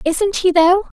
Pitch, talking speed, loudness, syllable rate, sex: 360 Hz, 185 wpm, -15 LUFS, 3.7 syllables/s, female